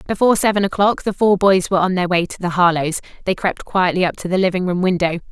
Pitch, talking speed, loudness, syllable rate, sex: 185 Hz, 250 wpm, -17 LUFS, 6.7 syllables/s, female